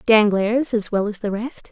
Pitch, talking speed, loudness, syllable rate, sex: 215 Hz, 210 wpm, -20 LUFS, 4.4 syllables/s, female